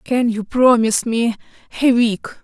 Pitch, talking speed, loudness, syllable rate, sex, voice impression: 235 Hz, 150 wpm, -17 LUFS, 4.6 syllables/s, female, very feminine, slightly adult-like, very thin, tensed, powerful, bright, slightly hard, very clear, very fluent, slightly cool, intellectual, very refreshing, sincere, slightly calm, friendly, slightly reassuring, very unique, elegant, wild, sweet, very lively, strict, intense, slightly sharp